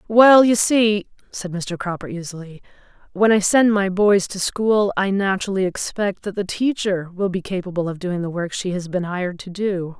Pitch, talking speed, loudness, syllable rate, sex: 190 Hz, 200 wpm, -19 LUFS, 4.9 syllables/s, female